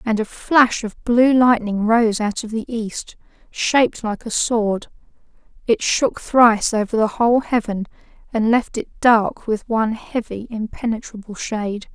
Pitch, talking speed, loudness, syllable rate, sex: 225 Hz, 155 wpm, -19 LUFS, 4.3 syllables/s, female